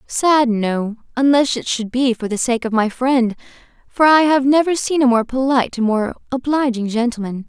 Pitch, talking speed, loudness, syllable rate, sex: 250 Hz, 195 wpm, -17 LUFS, 5.0 syllables/s, female